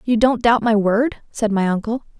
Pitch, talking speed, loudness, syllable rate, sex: 225 Hz, 220 wpm, -18 LUFS, 4.7 syllables/s, female